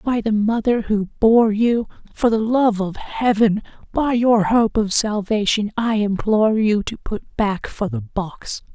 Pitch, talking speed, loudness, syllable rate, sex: 215 Hz, 160 wpm, -19 LUFS, 3.9 syllables/s, female